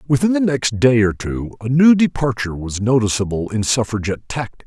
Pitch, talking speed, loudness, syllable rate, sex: 120 Hz, 180 wpm, -18 LUFS, 5.7 syllables/s, male